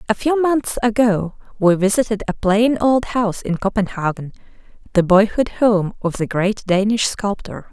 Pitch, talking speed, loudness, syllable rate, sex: 210 Hz, 155 wpm, -18 LUFS, 4.6 syllables/s, female